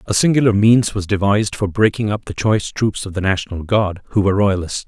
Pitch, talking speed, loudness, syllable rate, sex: 100 Hz, 220 wpm, -17 LUFS, 6.0 syllables/s, male